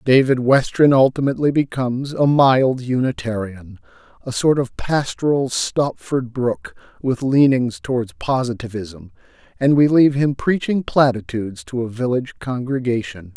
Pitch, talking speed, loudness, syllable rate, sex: 125 Hz, 120 wpm, -18 LUFS, 4.7 syllables/s, male